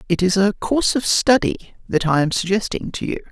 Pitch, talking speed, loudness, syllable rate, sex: 205 Hz, 215 wpm, -19 LUFS, 6.1 syllables/s, male